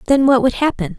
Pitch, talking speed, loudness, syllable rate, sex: 255 Hz, 245 wpm, -15 LUFS, 6.2 syllables/s, female